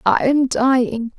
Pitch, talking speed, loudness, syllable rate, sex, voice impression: 255 Hz, 150 wpm, -17 LUFS, 3.8 syllables/s, female, feminine, adult-like, relaxed, weak, soft, slightly raspy, slightly cute, calm, friendly, reassuring, elegant, slightly sweet, kind, modest